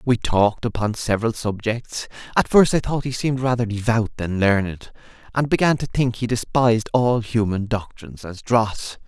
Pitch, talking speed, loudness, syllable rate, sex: 115 Hz, 170 wpm, -21 LUFS, 5.1 syllables/s, male